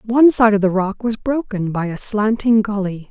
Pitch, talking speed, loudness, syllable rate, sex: 215 Hz, 210 wpm, -17 LUFS, 5.0 syllables/s, female